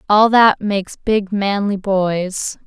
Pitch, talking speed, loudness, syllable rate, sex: 200 Hz, 135 wpm, -16 LUFS, 3.3 syllables/s, female